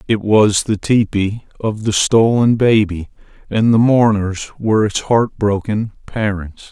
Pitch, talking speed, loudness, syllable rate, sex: 105 Hz, 145 wpm, -15 LUFS, 4.0 syllables/s, male